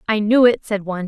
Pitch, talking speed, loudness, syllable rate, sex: 210 Hz, 280 wpm, -17 LUFS, 6.6 syllables/s, female